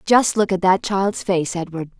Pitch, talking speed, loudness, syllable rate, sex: 190 Hz, 210 wpm, -19 LUFS, 4.4 syllables/s, female